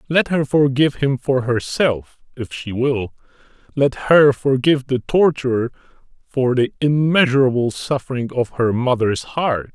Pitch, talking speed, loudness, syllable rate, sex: 130 Hz, 135 wpm, -18 LUFS, 4.5 syllables/s, male